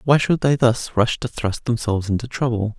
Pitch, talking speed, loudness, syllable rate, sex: 120 Hz, 215 wpm, -20 LUFS, 5.2 syllables/s, male